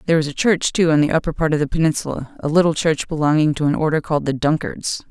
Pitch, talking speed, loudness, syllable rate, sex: 155 Hz, 260 wpm, -19 LUFS, 6.8 syllables/s, female